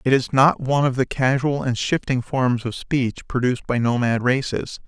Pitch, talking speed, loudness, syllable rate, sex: 130 Hz, 195 wpm, -21 LUFS, 5.1 syllables/s, male